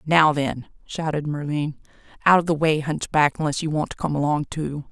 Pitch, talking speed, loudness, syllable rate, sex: 150 Hz, 195 wpm, -22 LUFS, 5.2 syllables/s, female